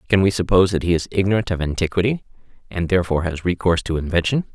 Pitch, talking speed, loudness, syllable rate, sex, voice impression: 90 Hz, 200 wpm, -20 LUFS, 7.5 syllables/s, male, masculine, adult-like, thick, tensed, powerful, slightly dark, muffled, slightly raspy, intellectual, sincere, mature, wild, slightly kind, slightly modest